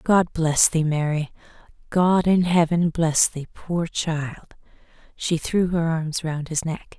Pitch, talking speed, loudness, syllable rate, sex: 165 Hz, 145 wpm, -22 LUFS, 3.5 syllables/s, female